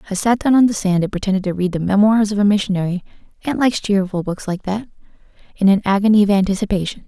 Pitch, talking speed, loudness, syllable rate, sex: 200 Hz, 205 wpm, -17 LUFS, 7.0 syllables/s, female